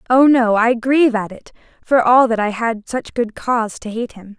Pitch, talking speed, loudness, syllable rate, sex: 235 Hz, 230 wpm, -16 LUFS, 4.9 syllables/s, female